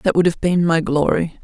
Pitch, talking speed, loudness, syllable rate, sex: 165 Hz, 250 wpm, -17 LUFS, 5.1 syllables/s, female